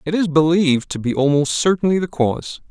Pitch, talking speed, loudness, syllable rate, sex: 160 Hz, 200 wpm, -18 LUFS, 5.9 syllables/s, male